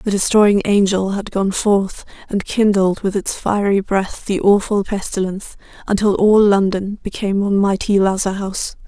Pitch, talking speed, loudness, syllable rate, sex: 200 Hz, 155 wpm, -17 LUFS, 4.9 syllables/s, female